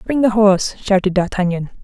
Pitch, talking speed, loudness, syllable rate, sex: 200 Hz, 165 wpm, -16 LUFS, 5.8 syllables/s, female